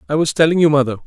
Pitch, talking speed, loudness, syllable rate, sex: 150 Hz, 280 wpm, -15 LUFS, 8.2 syllables/s, male